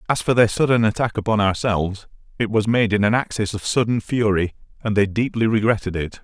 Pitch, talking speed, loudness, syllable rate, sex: 110 Hz, 200 wpm, -20 LUFS, 5.8 syllables/s, male